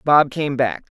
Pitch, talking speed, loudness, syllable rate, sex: 140 Hz, 185 wpm, -19 LUFS, 3.8 syllables/s, male